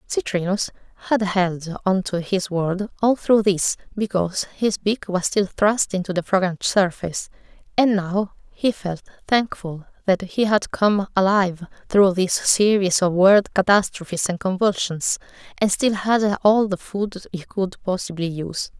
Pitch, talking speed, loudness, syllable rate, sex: 195 Hz, 155 wpm, -21 LUFS, 4.4 syllables/s, female